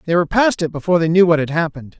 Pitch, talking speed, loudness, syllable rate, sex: 170 Hz, 300 wpm, -16 LUFS, 8.1 syllables/s, male